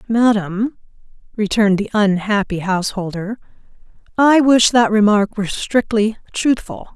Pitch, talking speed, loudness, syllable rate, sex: 215 Hz, 105 wpm, -16 LUFS, 4.6 syllables/s, female